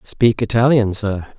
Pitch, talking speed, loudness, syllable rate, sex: 110 Hz, 130 wpm, -17 LUFS, 4.1 syllables/s, male